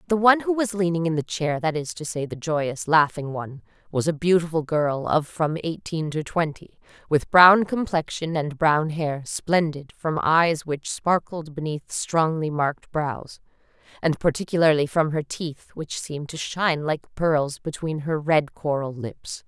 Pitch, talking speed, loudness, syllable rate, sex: 160 Hz, 165 wpm, -23 LUFS, 4.4 syllables/s, female